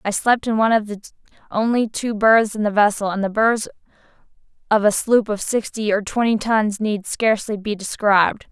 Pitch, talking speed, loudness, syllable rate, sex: 215 Hz, 185 wpm, -19 LUFS, 5.2 syllables/s, female